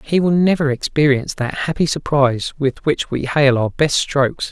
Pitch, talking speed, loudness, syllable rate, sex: 145 Hz, 185 wpm, -17 LUFS, 5.1 syllables/s, male